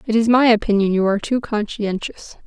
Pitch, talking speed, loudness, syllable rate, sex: 215 Hz, 195 wpm, -18 LUFS, 5.7 syllables/s, female